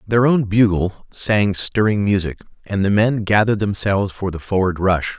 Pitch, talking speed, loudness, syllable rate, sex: 100 Hz, 175 wpm, -18 LUFS, 4.9 syllables/s, male